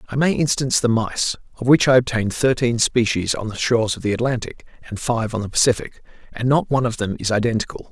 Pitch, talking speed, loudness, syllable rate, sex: 120 Hz, 220 wpm, -20 LUFS, 6.4 syllables/s, male